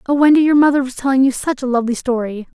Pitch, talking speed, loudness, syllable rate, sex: 260 Hz, 255 wpm, -15 LUFS, 7.3 syllables/s, female